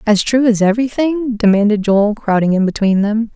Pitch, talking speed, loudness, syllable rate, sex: 220 Hz, 180 wpm, -14 LUFS, 5.3 syllables/s, female